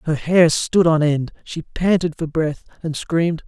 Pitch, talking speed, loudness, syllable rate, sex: 160 Hz, 190 wpm, -19 LUFS, 4.2 syllables/s, male